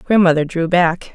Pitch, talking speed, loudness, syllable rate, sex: 175 Hz, 155 wpm, -15 LUFS, 4.8 syllables/s, female